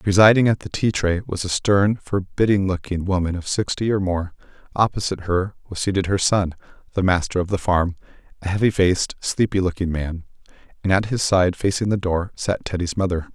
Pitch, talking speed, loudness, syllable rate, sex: 95 Hz, 190 wpm, -21 LUFS, 5.5 syllables/s, male